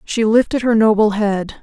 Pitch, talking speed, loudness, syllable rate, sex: 215 Hz, 185 wpm, -15 LUFS, 4.8 syllables/s, female